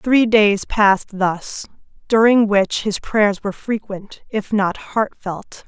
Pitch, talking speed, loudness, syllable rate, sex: 205 Hz, 140 wpm, -18 LUFS, 3.5 syllables/s, female